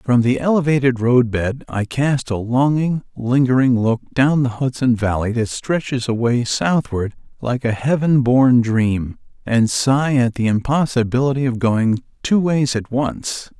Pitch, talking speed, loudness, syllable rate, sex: 125 Hz, 155 wpm, -18 LUFS, 4.1 syllables/s, male